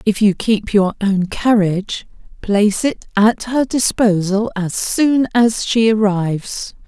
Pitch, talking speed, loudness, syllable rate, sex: 210 Hz, 140 wpm, -16 LUFS, 3.8 syllables/s, female